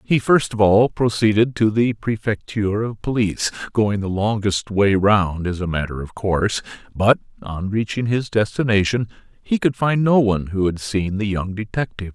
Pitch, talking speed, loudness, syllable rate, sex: 105 Hz, 180 wpm, -20 LUFS, 4.9 syllables/s, male